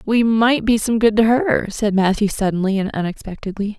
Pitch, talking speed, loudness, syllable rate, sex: 215 Hz, 190 wpm, -18 LUFS, 5.3 syllables/s, female